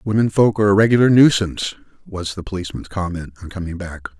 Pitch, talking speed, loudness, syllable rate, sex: 95 Hz, 185 wpm, -18 LUFS, 6.8 syllables/s, male